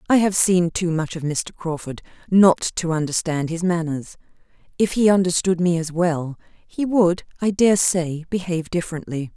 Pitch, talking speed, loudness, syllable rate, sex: 170 Hz, 165 wpm, -20 LUFS, 4.8 syllables/s, female